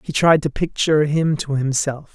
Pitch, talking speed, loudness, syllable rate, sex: 150 Hz, 195 wpm, -19 LUFS, 4.9 syllables/s, male